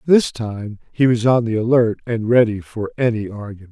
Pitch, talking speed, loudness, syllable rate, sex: 115 Hz, 195 wpm, -18 LUFS, 5.1 syllables/s, male